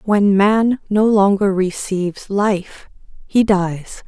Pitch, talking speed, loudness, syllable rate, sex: 200 Hz, 120 wpm, -16 LUFS, 3.1 syllables/s, female